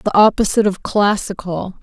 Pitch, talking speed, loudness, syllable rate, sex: 200 Hz, 130 wpm, -16 LUFS, 5.6 syllables/s, female